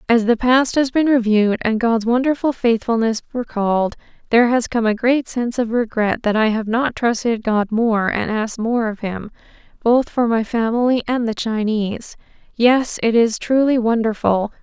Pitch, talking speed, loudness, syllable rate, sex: 230 Hz, 175 wpm, -18 LUFS, 4.9 syllables/s, female